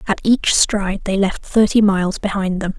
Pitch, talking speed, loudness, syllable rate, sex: 200 Hz, 195 wpm, -17 LUFS, 5.1 syllables/s, female